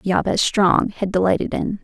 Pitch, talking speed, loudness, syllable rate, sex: 195 Hz, 165 wpm, -19 LUFS, 4.7 syllables/s, female